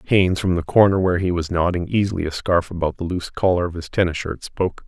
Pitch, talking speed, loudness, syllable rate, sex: 90 Hz, 245 wpm, -20 LUFS, 6.5 syllables/s, male